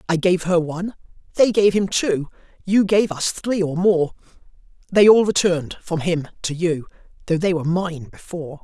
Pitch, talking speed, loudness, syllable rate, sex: 175 Hz, 180 wpm, -19 LUFS, 5.0 syllables/s, male